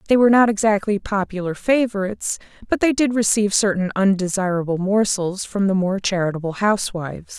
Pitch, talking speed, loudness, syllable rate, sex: 200 Hz, 145 wpm, -19 LUFS, 5.8 syllables/s, female